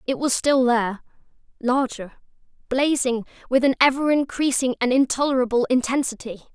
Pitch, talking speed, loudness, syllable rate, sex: 255 Hz, 110 wpm, -21 LUFS, 5.4 syllables/s, female